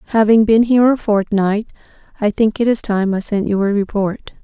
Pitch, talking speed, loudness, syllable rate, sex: 210 Hz, 205 wpm, -16 LUFS, 5.3 syllables/s, female